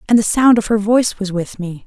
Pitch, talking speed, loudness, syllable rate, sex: 210 Hz, 290 wpm, -15 LUFS, 5.9 syllables/s, female